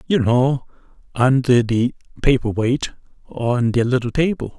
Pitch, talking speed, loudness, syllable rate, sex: 125 Hz, 105 wpm, -19 LUFS, 4.3 syllables/s, male